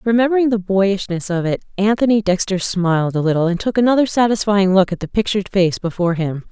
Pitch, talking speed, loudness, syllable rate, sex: 195 Hz, 195 wpm, -17 LUFS, 6.1 syllables/s, female